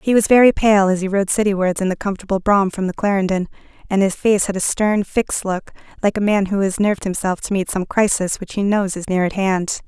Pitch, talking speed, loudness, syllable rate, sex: 195 Hz, 250 wpm, -18 LUFS, 6.0 syllables/s, female